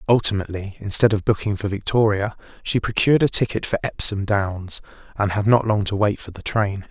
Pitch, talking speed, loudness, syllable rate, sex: 105 Hz, 190 wpm, -20 LUFS, 5.6 syllables/s, male